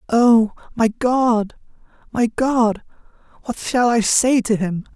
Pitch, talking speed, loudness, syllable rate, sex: 230 Hz, 135 wpm, -18 LUFS, 3.3 syllables/s, male